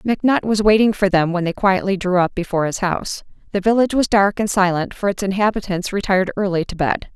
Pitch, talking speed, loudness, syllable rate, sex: 195 Hz, 220 wpm, -18 LUFS, 6.2 syllables/s, female